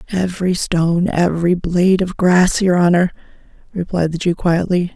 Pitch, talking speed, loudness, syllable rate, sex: 180 Hz, 145 wpm, -16 LUFS, 5.2 syllables/s, female